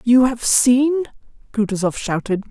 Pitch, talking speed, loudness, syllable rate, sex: 235 Hz, 120 wpm, -18 LUFS, 4.6 syllables/s, female